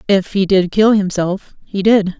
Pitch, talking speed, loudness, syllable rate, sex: 195 Hz, 190 wpm, -15 LUFS, 4.1 syllables/s, female